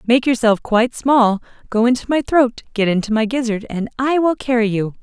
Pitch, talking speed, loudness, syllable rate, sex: 235 Hz, 190 wpm, -17 LUFS, 5.3 syllables/s, female